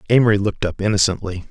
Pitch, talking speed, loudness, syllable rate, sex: 100 Hz, 160 wpm, -18 LUFS, 7.5 syllables/s, male